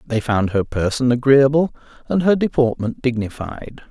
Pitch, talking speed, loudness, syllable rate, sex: 125 Hz, 140 wpm, -18 LUFS, 4.8 syllables/s, male